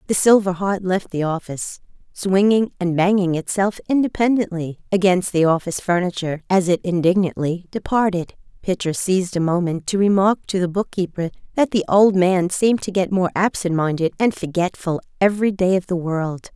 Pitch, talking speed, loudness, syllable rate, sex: 185 Hz, 165 wpm, -19 LUFS, 5.3 syllables/s, female